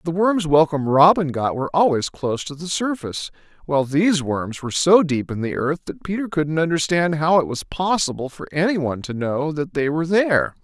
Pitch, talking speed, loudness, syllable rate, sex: 160 Hz, 215 wpm, -20 LUFS, 5.7 syllables/s, male